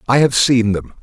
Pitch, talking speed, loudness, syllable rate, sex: 115 Hz, 235 wpm, -14 LUFS, 4.9 syllables/s, male